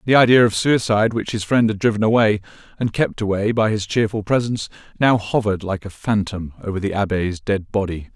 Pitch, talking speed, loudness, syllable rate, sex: 105 Hz, 200 wpm, -19 LUFS, 5.8 syllables/s, male